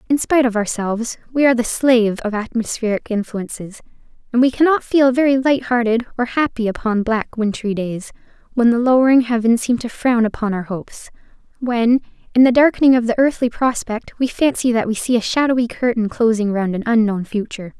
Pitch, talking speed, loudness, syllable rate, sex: 235 Hz, 180 wpm, -17 LUFS, 5.7 syllables/s, female